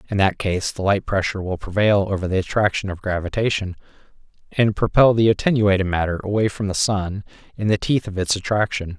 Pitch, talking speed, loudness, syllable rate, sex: 100 Hz, 185 wpm, -20 LUFS, 5.8 syllables/s, male